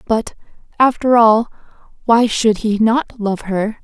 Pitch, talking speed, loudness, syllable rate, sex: 225 Hz, 140 wpm, -15 LUFS, 3.8 syllables/s, female